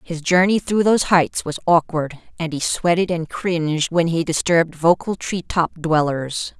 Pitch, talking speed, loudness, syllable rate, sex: 165 Hz, 165 wpm, -19 LUFS, 4.5 syllables/s, female